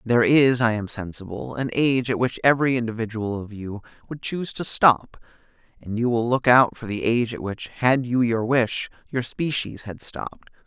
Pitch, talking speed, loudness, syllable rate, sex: 120 Hz, 195 wpm, -22 LUFS, 5.2 syllables/s, male